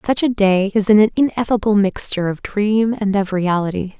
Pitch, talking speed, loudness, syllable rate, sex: 205 Hz, 180 wpm, -17 LUFS, 5.0 syllables/s, female